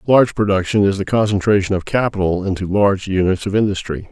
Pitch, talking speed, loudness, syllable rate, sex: 100 Hz, 175 wpm, -17 LUFS, 6.3 syllables/s, male